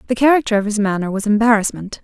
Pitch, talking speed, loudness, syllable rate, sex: 215 Hz, 205 wpm, -16 LUFS, 7.1 syllables/s, female